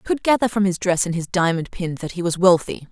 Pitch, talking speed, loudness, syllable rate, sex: 180 Hz, 290 wpm, -20 LUFS, 6.2 syllables/s, female